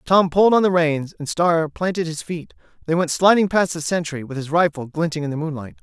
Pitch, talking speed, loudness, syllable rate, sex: 165 Hz, 235 wpm, -20 LUFS, 5.7 syllables/s, male